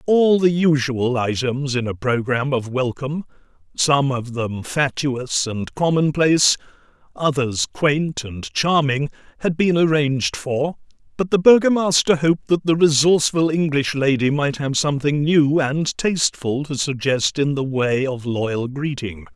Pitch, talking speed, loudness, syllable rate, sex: 140 Hz, 145 wpm, -19 LUFS, 4.4 syllables/s, male